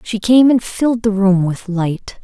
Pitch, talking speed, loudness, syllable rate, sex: 210 Hz, 215 wpm, -15 LUFS, 4.2 syllables/s, female